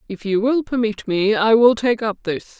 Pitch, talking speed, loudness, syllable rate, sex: 220 Hz, 230 wpm, -18 LUFS, 4.7 syllables/s, female